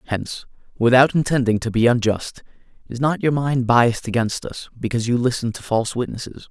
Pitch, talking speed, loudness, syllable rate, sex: 120 Hz, 175 wpm, -20 LUFS, 6.0 syllables/s, male